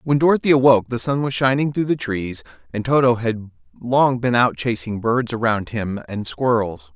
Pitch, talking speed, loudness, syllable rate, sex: 120 Hz, 190 wpm, -19 LUFS, 5.0 syllables/s, male